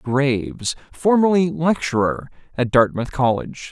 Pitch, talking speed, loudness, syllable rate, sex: 140 Hz, 95 wpm, -19 LUFS, 4.4 syllables/s, male